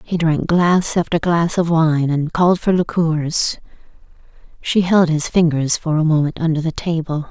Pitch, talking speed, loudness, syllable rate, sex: 165 Hz, 170 wpm, -17 LUFS, 4.5 syllables/s, female